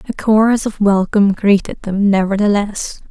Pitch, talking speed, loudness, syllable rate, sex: 205 Hz, 135 wpm, -15 LUFS, 5.0 syllables/s, female